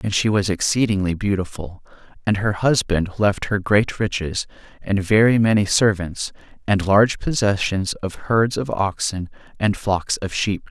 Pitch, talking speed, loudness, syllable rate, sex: 100 Hz, 150 wpm, -20 LUFS, 4.5 syllables/s, male